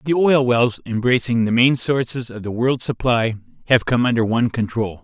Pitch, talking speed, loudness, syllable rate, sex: 120 Hz, 190 wpm, -19 LUFS, 5.1 syllables/s, male